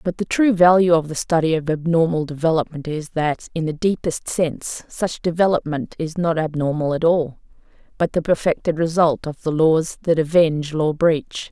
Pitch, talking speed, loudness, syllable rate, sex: 160 Hz, 175 wpm, -20 LUFS, 5.0 syllables/s, female